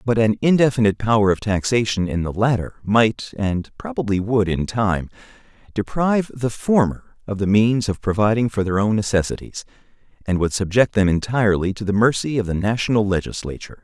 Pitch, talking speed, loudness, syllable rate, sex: 110 Hz, 170 wpm, -20 LUFS, 5.6 syllables/s, male